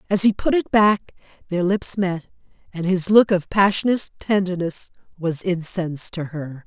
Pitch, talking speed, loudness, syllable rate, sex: 185 Hz, 160 wpm, -20 LUFS, 4.7 syllables/s, female